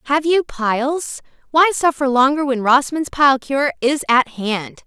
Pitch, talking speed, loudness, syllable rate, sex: 275 Hz, 160 wpm, -17 LUFS, 4.1 syllables/s, female